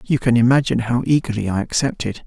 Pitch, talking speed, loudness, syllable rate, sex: 120 Hz, 185 wpm, -18 LUFS, 6.5 syllables/s, male